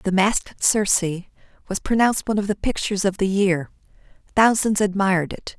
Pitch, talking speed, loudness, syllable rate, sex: 200 Hz, 160 wpm, -21 LUFS, 5.9 syllables/s, female